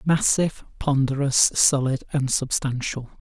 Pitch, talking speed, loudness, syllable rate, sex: 140 Hz, 90 wpm, -22 LUFS, 4.3 syllables/s, male